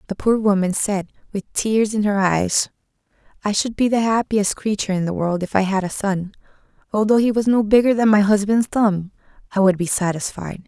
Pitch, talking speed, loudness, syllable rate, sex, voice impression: 205 Hz, 200 wpm, -19 LUFS, 5.3 syllables/s, female, feminine, slightly adult-like, fluent, sweet